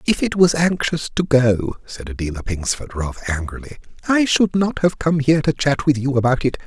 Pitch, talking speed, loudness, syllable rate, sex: 140 Hz, 205 wpm, -19 LUFS, 5.3 syllables/s, male